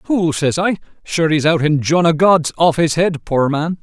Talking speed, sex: 235 wpm, male